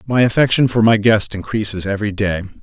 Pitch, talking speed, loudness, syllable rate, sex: 105 Hz, 185 wpm, -16 LUFS, 6.0 syllables/s, male